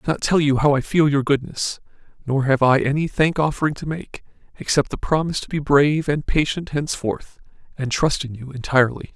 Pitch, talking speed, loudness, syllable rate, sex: 145 Hz, 205 wpm, -20 LUFS, 5.8 syllables/s, male